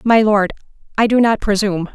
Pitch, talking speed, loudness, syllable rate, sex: 210 Hz, 185 wpm, -15 LUFS, 5.7 syllables/s, female